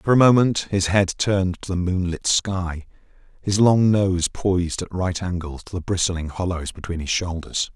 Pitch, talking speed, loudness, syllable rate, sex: 95 Hz, 185 wpm, -21 LUFS, 4.6 syllables/s, male